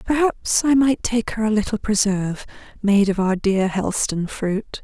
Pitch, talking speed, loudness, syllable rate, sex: 210 Hz, 175 wpm, -20 LUFS, 4.6 syllables/s, female